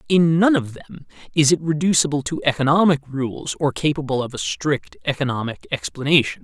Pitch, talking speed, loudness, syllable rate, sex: 145 Hz, 160 wpm, -20 LUFS, 5.3 syllables/s, male